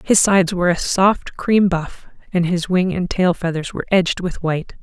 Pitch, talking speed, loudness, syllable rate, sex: 180 Hz, 210 wpm, -18 LUFS, 5.3 syllables/s, female